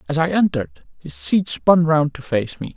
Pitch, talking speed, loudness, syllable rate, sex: 140 Hz, 215 wpm, -19 LUFS, 5.2 syllables/s, male